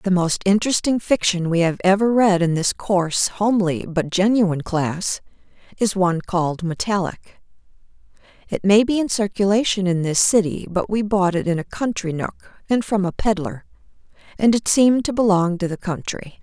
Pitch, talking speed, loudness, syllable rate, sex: 190 Hz, 170 wpm, -20 LUFS, 5.2 syllables/s, female